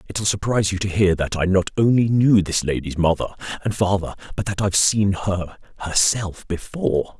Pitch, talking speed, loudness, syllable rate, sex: 95 Hz, 185 wpm, -20 LUFS, 5.3 syllables/s, male